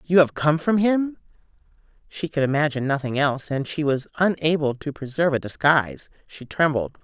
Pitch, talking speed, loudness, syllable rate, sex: 150 Hz, 170 wpm, -22 LUFS, 5.6 syllables/s, female